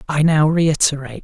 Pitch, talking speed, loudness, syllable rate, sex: 150 Hz, 145 wpm, -16 LUFS, 5.4 syllables/s, male